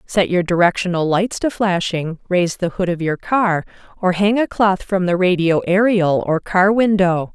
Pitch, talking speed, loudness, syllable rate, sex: 185 Hz, 190 wpm, -17 LUFS, 4.6 syllables/s, female